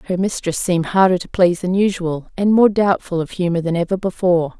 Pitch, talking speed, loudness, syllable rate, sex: 180 Hz, 210 wpm, -17 LUFS, 6.0 syllables/s, female